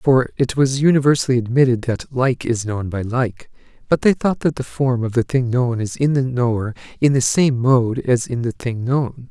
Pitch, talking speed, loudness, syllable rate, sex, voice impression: 125 Hz, 220 wpm, -18 LUFS, 4.8 syllables/s, male, masculine, slightly young, slightly weak, slightly bright, soft, slightly refreshing, slightly sincere, calm, slightly friendly, reassuring, kind, modest